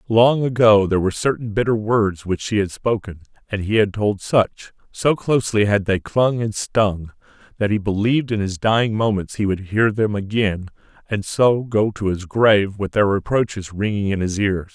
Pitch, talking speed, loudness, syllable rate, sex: 105 Hz, 195 wpm, -19 LUFS, 4.9 syllables/s, male